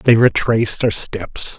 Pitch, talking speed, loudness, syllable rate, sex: 110 Hz, 150 wpm, -17 LUFS, 3.9 syllables/s, male